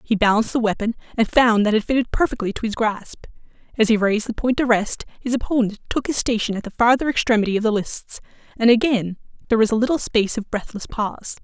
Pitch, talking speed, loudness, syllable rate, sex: 225 Hz, 220 wpm, -20 LUFS, 6.5 syllables/s, female